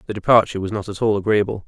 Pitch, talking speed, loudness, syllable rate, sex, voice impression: 100 Hz, 250 wpm, -19 LUFS, 8.0 syllables/s, male, masculine, adult-like, slightly relaxed, slightly soft, muffled, slightly raspy, cool, intellectual, calm, friendly, slightly wild, kind, slightly modest